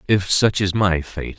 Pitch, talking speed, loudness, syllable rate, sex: 95 Hz, 215 wpm, -18 LUFS, 4.1 syllables/s, male